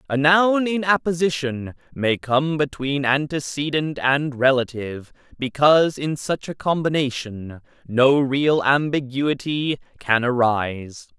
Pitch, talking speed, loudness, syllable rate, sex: 140 Hz, 105 wpm, -20 LUFS, 4.0 syllables/s, male